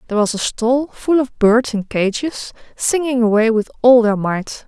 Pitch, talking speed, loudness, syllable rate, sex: 235 Hz, 195 wpm, -16 LUFS, 4.6 syllables/s, female